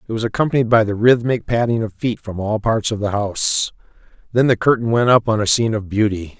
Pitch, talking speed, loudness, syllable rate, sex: 110 Hz, 235 wpm, -17 LUFS, 6.0 syllables/s, male